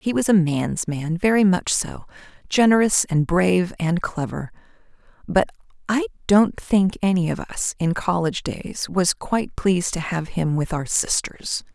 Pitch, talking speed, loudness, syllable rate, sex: 180 Hz, 165 wpm, -21 LUFS, 4.5 syllables/s, female